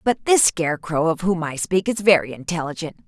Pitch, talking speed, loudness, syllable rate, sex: 170 Hz, 195 wpm, -20 LUFS, 5.5 syllables/s, female